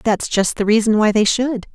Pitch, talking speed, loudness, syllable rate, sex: 215 Hz, 240 wpm, -16 LUFS, 5.1 syllables/s, female